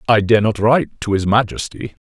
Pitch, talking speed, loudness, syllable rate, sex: 110 Hz, 205 wpm, -16 LUFS, 5.6 syllables/s, male